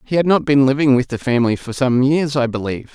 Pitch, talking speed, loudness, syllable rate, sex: 135 Hz, 265 wpm, -16 LUFS, 6.3 syllables/s, male